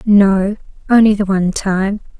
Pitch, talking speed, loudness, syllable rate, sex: 200 Hz, 135 wpm, -14 LUFS, 4.4 syllables/s, female